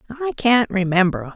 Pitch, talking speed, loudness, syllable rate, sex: 210 Hz, 135 wpm, -18 LUFS, 4.6 syllables/s, female